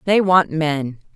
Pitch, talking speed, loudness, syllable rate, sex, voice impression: 160 Hz, 155 wpm, -17 LUFS, 3.4 syllables/s, female, feminine, adult-like, tensed, bright, clear, slightly halting, intellectual, friendly, elegant, lively, slightly intense, sharp